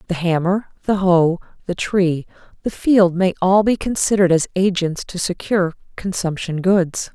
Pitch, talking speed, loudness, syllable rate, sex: 185 Hz, 150 wpm, -18 LUFS, 4.7 syllables/s, female